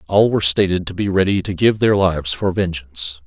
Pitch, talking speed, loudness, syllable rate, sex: 90 Hz, 220 wpm, -17 LUFS, 5.8 syllables/s, male